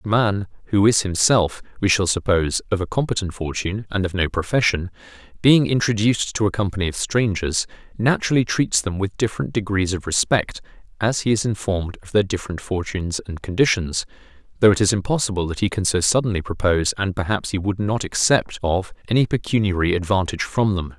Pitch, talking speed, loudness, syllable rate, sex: 100 Hz, 180 wpm, -21 LUFS, 5.9 syllables/s, male